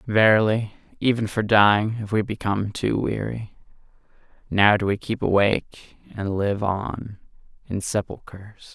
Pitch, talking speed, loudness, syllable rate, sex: 105 Hz, 125 wpm, -22 LUFS, 4.7 syllables/s, male